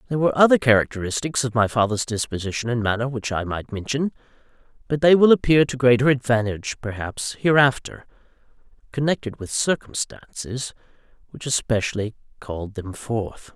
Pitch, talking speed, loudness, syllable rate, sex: 120 Hz, 135 wpm, -21 LUFS, 5.6 syllables/s, male